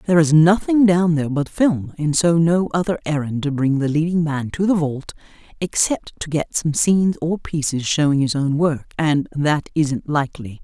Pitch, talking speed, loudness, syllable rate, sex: 155 Hz, 195 wpm, -19 LUFS, 4.8 syllables/s, female